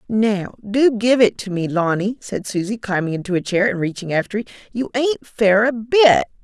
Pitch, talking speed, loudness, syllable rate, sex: 210 Hz, 205 wpm, -19 LUFS, 4.9 syllables/s, female